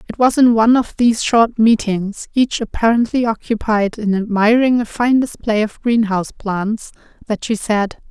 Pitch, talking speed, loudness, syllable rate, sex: 220 Hz, 165 wpm, -16 LUFS, 4.8 syllables/s, female